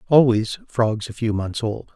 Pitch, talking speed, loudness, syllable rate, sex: 115 Hz, 185 wpm, -21 LUFS, 4.1 syllables/s, male